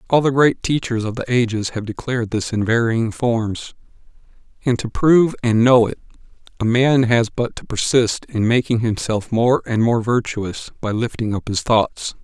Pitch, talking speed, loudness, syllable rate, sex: 115 Hz, 180 wpm, -18 LUFS, 4.7 syllables/s, male